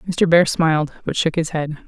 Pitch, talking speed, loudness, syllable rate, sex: 160 Hz, 225 wpm, -18 LUFS, 5.1 syllables/s, female